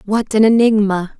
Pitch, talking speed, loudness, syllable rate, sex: 210 Hz, 150 wpm, -14 LUFS, 4.8 syllables/s, female